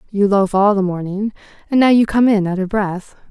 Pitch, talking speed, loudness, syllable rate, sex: 200 Hz, 235 wpm, -16 LUFS, 5.3 syllables/s, female